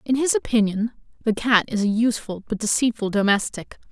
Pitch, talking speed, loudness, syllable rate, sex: 220 Hz, 170 wpm, -22 LUFS, 5.7 syllables/s, female